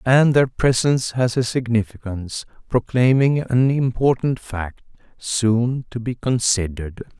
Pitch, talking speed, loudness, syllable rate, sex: 120 Hz, 115 wpm, -20 LUFS, 4.3 syllables/s, male